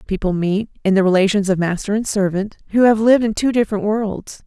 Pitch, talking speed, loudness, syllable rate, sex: 205 Hz, 215 wpm, -17 LUFS, 6.0 syllables/s, female